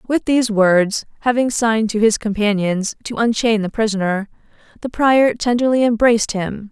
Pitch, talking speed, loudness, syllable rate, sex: 220 Hz, 150 wpm, -17 LUFS, 4.9 syllables/s, female